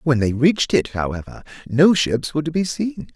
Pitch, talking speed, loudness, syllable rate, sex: 145 Hz, 210 wpm, -19 LUFS, 5.4 syllables/s, male